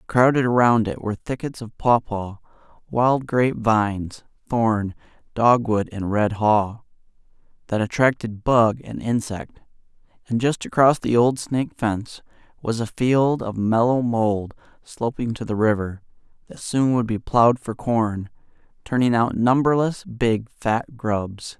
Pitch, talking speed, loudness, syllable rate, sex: 115 Hz, 140 wpm, -21 LUFS, 4.1 syllables/s, male